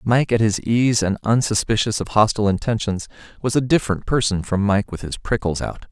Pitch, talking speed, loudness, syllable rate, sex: 110 Hz, 195 wpm, -20 LUFS, 5.6 syllables/s, male